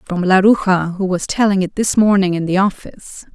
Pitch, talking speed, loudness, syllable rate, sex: 190 Hz, 195 wpm, -15 LUFS, 5.4 syllables/s, female